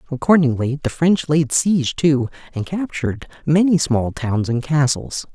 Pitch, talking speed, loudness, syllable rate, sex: 145 Hz, 145 wpm, -19 LUFS, 4.6 syllables/s, male